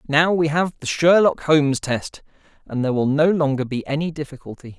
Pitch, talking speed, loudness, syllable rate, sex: 150 Hz, 190 wpm, -19 LUFS, 5.6 syllables/s, male